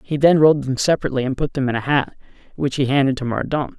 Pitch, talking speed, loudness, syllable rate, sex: 135 Hz, 255 wpm, -19 LUFS, 7.0 syllables/s, male